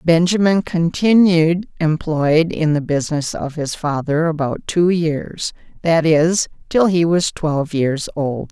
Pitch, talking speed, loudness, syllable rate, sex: 165 Hz, 140 wpm, -17 LUFS, 3.9 syllables/s, female